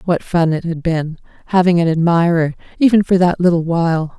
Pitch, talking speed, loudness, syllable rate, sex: 170 Hz, 185 wpm, -15 LUFS, 5.5 syllables/s, female